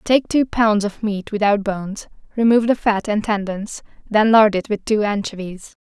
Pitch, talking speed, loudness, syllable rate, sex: 210 Hz, 185 wpm, -18 LUFS, 4.8 syllables/s, female